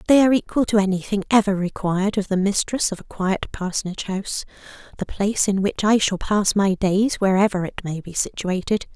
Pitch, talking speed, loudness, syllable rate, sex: 200 Hz, 190 wpm, -21 LUFS, 5.7 syllables/s, female